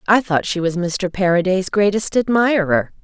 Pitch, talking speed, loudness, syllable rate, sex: 190 Hz, 160 wpm, -17 LUFS, 4.7 syllables/s, female